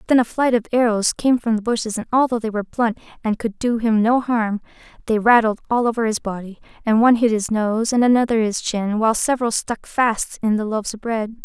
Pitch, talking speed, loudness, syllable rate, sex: 225 Hz, 230 wpm, -19 LUFS, 5.8 syllables/s, female